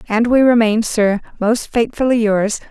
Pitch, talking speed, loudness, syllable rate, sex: 225 Hz, 155 wpm, -15 LUFS, 4.4 syllables/s, female